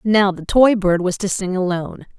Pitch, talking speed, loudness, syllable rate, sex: 195 Hz, 220 wpm, -17 LUFS, 5.0 syllables/s, female